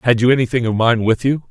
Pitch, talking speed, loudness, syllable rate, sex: 120 Hz, 280 wpm, -16 LUFS, 6.5 syllables/s, male